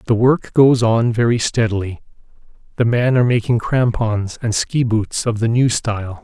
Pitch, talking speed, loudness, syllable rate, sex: 115 Hz, 165 wpm, -17 LUFS, 4.8 syllables/s, male